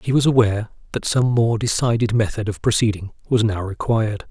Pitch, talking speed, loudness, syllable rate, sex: 110 Hz, 180 wpm, -20 LUFS, 5.8 syllables/s, male